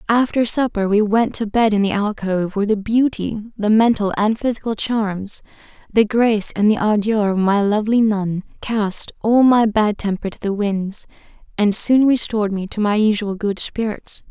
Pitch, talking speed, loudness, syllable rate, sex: 210 Hz, 180 wpm, -18 LUFS, 4.7 syllables/s, female